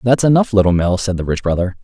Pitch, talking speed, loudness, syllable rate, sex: 100 Hz, 260 wpm, -15 LUFS, 6.5 syllables/s, male